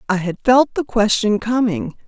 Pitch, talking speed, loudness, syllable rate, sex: 215 Hz, 175 wpm, -17 LUFS, 4.7 syllables/s, female